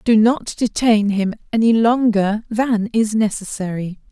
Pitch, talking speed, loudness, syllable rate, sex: 215 Hz, 130 wpm, -18 LUFS, 4.0 syllables/s, female